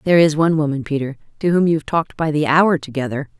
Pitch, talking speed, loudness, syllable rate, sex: 155 Hz, 245 wpm, -18 LUFS, 7.1 syllables/s, female